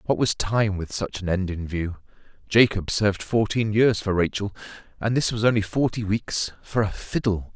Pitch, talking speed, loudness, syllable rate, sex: 105 Hz, 190 wpm, -24 LUFS, 4.8 syllables/s, male